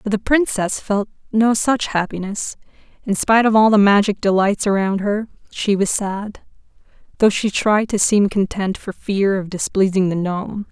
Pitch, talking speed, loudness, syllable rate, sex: 205 Hz, 175 wpm, -18 LUFS, 4.7 syllables/s, female